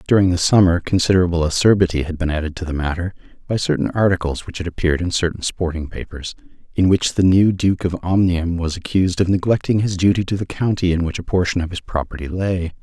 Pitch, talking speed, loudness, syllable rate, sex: 90 Hz, 210 wpm, -19 LUFS, 6.3 syllables/s, male